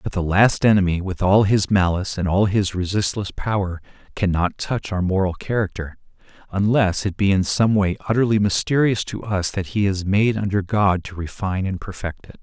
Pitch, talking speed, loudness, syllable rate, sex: 100 Hz, 185 wpm, -20 LUFS, 5.2 syllables/s, male